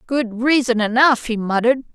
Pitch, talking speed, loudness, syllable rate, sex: 240 Hz, 155 wpm, -17 LUFS, 5.2 syllables/s, female